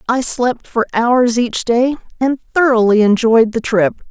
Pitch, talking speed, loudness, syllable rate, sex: 235 Hz, 160 wpm, -14 LUFS, 4.2 syllables/s, female